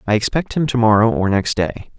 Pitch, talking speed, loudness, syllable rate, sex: 115 Hz, 240 wpm, -17 LUFS, 5.6 syllables/s, male